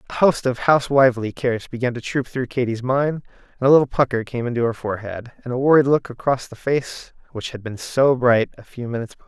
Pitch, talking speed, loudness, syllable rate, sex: 125 Hz, 225 wpm, -20 LUFS, 6.4 syllables/s, male